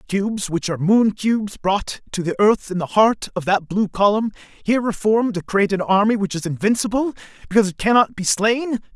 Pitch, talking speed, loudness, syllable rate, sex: 205 Hz, 200 wpm, -19 LUFS, 5.8 syllables/s, male